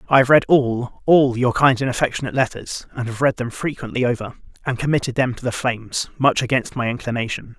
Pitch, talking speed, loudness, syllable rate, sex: 125 Hz, 205 wpm, -20 LUFS, 5.9 syllables/s, male